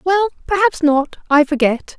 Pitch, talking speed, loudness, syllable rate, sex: 325 Hz, 120 wpm, -16 LUFS, 4.3 syllables/s, female